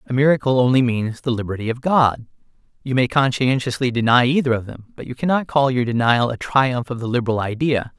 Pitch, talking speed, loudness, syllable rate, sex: 125 Hz, 205 wpm, -19 LUFS, 5.8 syllables/s, male